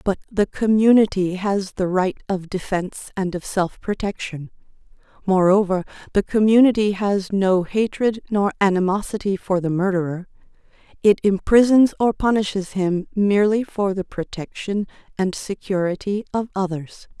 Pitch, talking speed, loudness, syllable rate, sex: 195 Hz, 125 wpm, -20 LUFS, 4.7 syllables/s, female